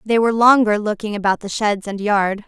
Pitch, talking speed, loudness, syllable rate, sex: 210 Hz, 220 wpm, -17 LUFS, 5.5 syllables/s, female